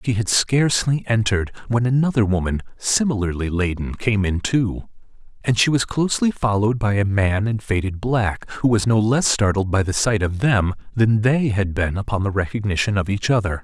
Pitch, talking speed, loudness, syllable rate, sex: 105 Hz, 195 wpm, -20 LUFS, 5.5 syllables/s, male